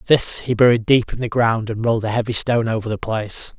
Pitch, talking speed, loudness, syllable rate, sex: 115 Hz, 250 wpm, -19 LUFS, 6.2 syllables/s, male